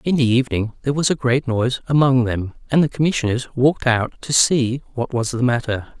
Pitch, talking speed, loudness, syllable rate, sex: 125 Hz, 210 wpm, -19 LUFS, 5.8 syllables/s, male